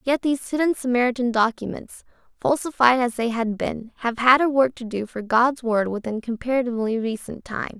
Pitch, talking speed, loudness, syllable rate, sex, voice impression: 240 Hz, 175 wpm, -22 LUFS, 5.6 syllables/s, female, very feminine, gender-neutral, very young, very thin, slightly tensed, slightly weak, very bright, very hard, very clear, fluent, very cute, intellectual, very refreshing, very sincere, slightly calm, very friendly, very reassuring, very unique, very elegant, very sweet, very lively, very kind, sharp, slightly modest, very light